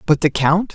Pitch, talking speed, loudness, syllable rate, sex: 165 Hz, 245 wpm, -17 LUFS, 4.9 syllables/s, male